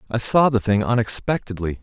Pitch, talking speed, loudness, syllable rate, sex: 115 Hz, 165 wpm, -20 LUFS, 5.6 syllables/s, male